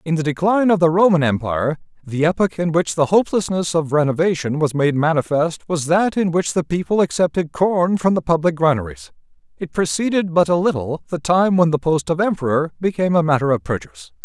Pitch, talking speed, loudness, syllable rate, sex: 160 Hz, 200 wpm, -18 LUFS, 5.9 syllables/s, male